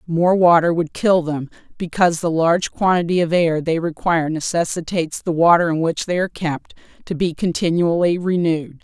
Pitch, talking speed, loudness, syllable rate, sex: 170 Hz, 170 wpm, -18 LUFS, 5.4 syllables/s, female